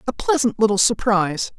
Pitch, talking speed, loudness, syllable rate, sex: 200 Hz, 150 wpm, -19 LUFS, 5.7 syllables/s, female